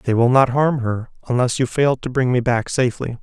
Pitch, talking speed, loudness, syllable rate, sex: 125 Hz, 240 wpm, -18 LUFS, 5.4 syllables/s, male